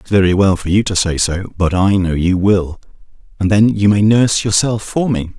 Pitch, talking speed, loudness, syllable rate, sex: 100 Hz, 235 wpm, -14 LUFS, 5.2 syllables/s, male